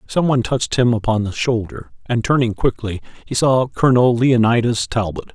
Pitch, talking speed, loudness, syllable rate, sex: 120 Hz, 170 wpm, -17 LUFS, 5.5 syllables/s, male